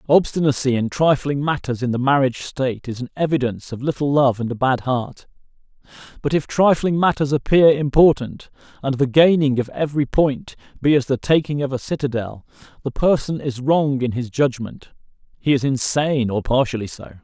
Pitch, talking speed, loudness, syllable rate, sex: 135 Hz, 175 wpm, -19 LUFS, 5.4 syllables/s, male